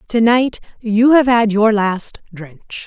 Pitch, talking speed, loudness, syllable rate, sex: 220 Hz, 170 wpm, -14 LUFS, 3.3 syllables/s, female